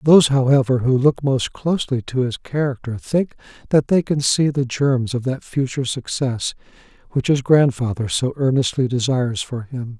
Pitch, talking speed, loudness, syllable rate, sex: 130 Hz, 170 wpm, -19 LUFS, 5.0 syllables/s, male